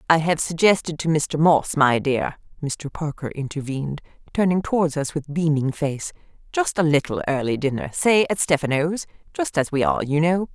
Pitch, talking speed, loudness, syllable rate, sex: 150 Hz, 165 wpm, -22 LUFS, 5.1 syllables/s, female